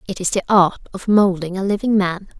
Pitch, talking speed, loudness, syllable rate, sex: 190 Hz, 225 wpm, -18 LUFS, 5.5 syllables/s, female